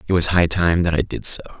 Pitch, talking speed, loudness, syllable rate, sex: 85 Hz, 300 wpm, -18 LUFS, 6.3 syllables/s, male